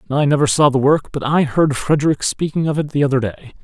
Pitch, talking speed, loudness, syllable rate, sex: 145 Hz, 245 wpm, -17 LUFS, 6.0 syllables/s, male